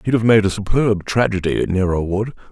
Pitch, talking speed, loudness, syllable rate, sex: 105 Hz, 190 wpm, -18 LUFS, 5.3 syllables/s, male